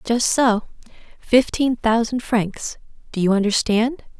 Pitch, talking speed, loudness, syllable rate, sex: 230 Hz, 115 wpm, -19 LUFS, 3.8 syllables/s, female